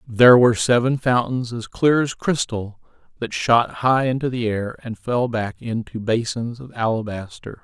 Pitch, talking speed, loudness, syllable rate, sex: 120 Hz, 165 wpm, -20 LUFS, 4.5 syllables/s, male